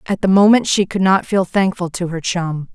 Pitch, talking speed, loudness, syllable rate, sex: 185 Hz, 240 wpm, -16 LUFS, 5.0 syllables/s, female